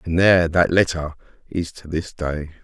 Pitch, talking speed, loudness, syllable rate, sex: 80 Hz, 180 wpm, -20 LUFS, 4.9 syllables/s, male